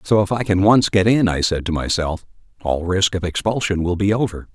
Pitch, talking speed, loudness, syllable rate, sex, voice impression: 95 Hz, 240 wpm, -18 LUFS, 5.4 syllables/s, male, middle-aged, thick, tensed, powerful, hard, fluent, cool, intellectual, sincere, calm, mature, friendly, reassuring, elegant, wild, lively, kind